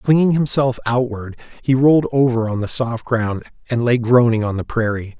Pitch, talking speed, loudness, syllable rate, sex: 120 Hz, 185 wpm, -18 LUFS, 5.2 syllables/s, male